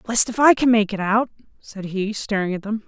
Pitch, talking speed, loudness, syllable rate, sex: 215 Hz, 250 wpm, -19 LUFS, 5.3 syllables/s, female